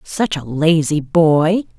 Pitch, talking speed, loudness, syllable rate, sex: 165 Hz, 135 wpm, -16 LUFS, 3.2 syllables/s, female